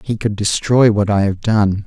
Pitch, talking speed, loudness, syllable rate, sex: 105 Hz, 225 wpm, -15 LUFS, 4.5 syllables/s, male